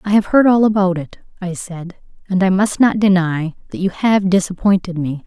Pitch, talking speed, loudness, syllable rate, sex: 190 Hz, 205 wpm, -16 LUFS, 5.0 syllables/s, female